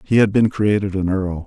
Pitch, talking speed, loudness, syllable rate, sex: 100 Hz, 245 wpm, -18 LUFS, 5.1 syllables/s, male